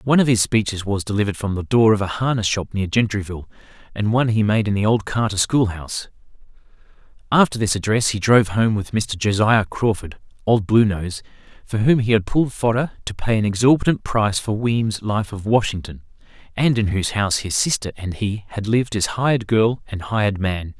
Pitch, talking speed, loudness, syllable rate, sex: 105 Hz, 195 wpm, -20 LUFS, 5.8 syllables/s, male